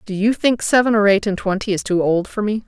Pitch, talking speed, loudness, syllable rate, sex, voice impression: 205 Hz, 290 wpm, -17 LUFS, 5.8 syllables/s, female, feminine, adult-like, tensed, powerful, clear, fluent, calm, reassuring, elegant, slightly strict